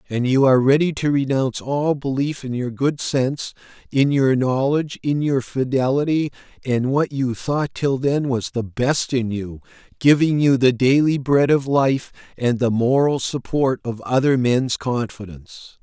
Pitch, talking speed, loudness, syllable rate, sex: 130 Hz, 165 wpm, -20 LUFS, 4.5 syllables/s, male